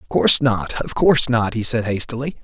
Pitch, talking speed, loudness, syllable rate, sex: 115 Hz, 195 wpm, -17 LUFS, 5.5 syllables/s, male